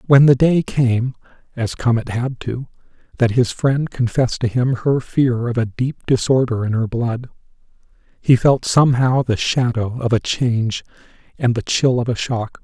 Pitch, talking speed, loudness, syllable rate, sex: 125 Hz, 180 wpm, -18 LUFS, 4.6 syllables/s, male